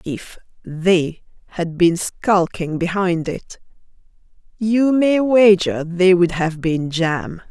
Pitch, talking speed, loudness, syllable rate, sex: 180 Hz, 120 wpm, -17 LUFS, 3.1 syllables/s, female